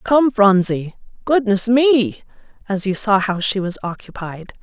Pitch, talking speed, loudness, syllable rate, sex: 210 Hz, 130 wpm, -17 LUFS, 4.1 syllables/s, female